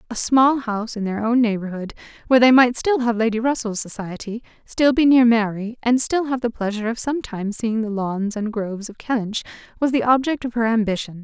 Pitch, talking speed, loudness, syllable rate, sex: 230 Hz, 210 wpm, -20 LUFS, 5.8 syllables/s, female